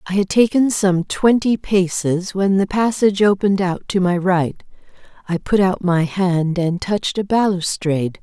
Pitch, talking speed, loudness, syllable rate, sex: 190 Hz, 170 wpm, -18 LUFS, 4.6 syllables/s, female